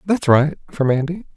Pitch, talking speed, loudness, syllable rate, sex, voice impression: 160 Hz, 175 wpm, -18 LUFS, 5.1 syllables/s, male, very masculine, slightly middle-aged, slightly thick, slightly relaxed, powerful, bright, slightly soft, clear, very fluent, slightly raspy, cool, very intellectual, very refreshing, sincere, calm, slightly mature, slightly friendly, slightly reassuring, very unique, slightly elegant, wild, very sweet, very lively, kind, intense, slightly sharp, light